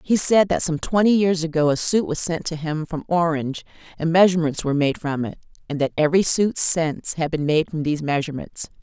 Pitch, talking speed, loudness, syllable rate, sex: 160 Hz, 220 wpm, -21 LUFS, 5.9 syllables/s, female